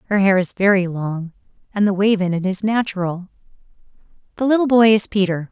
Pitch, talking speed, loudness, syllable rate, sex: 195 Hz, 185 wpm, -18 LUFS, 5.8 syllables/s, female